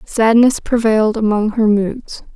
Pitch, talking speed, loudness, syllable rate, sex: 220 Hz, 125 wpm, -14 LUFS, 4.2 syllables/s, female